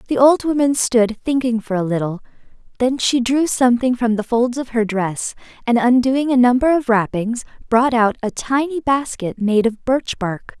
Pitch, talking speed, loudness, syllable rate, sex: 240 Hz, 185 wpm, -18 LUFS, 4.7 syllables/s, female